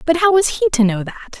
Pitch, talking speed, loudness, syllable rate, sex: 280 Hz, 300 wpm, -16 LUFS, 7.3 syllables/s, female